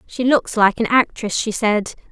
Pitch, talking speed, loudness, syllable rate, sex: 225 Hz, 200 wpm, -18 LUFS, 4.5 syllables/s, female